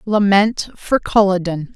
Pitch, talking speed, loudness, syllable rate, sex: 200 Hz, 100 wpm, -16 LUFS, 3.9 syllables/s, female